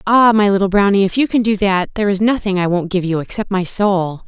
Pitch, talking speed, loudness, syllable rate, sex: 195 Hz, 265 wpm, -15 LUFS, 5.8 syllables/s, female